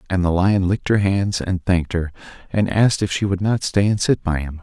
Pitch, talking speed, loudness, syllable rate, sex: 95 Hz, 260 wpm, -19 LUFS, 5.7 syllables/s, male